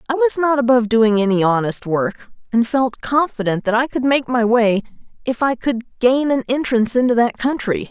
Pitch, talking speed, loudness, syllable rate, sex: 240 Hz, 195 wpm, -17 LUFS, 5.3 syllables/s, female